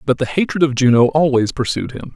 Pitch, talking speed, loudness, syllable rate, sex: 135 Hz, 220 wpm, -16 LUFS, 5.9 syllables/s, male